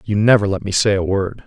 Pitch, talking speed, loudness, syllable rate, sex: 100 Hz, 285 wpm, -16 LUFS, 5.8 syllables/s, male